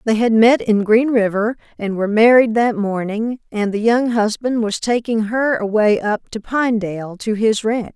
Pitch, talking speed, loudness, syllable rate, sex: 220 Hz, 190 wpm, -17 LUFS, 4.7 syllables/s, female